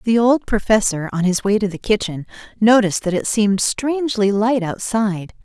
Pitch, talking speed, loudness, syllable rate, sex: 210 Hz, 175 wpm, -18 LUFS, 5.3 syllables/s, female